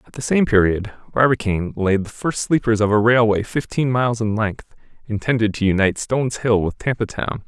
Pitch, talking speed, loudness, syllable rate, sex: 110 Hz, 195 wpm, -19 LUFS, 5.6 syllables/s, male